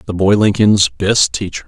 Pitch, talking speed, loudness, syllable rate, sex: 100 Hz, 180 wpm, -13 LUFS, 4.6 syllables/s, male